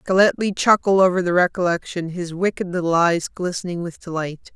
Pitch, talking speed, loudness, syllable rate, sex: 180 Hz, 160 wpm, -20 LUFS, 5.4 syllables/s, female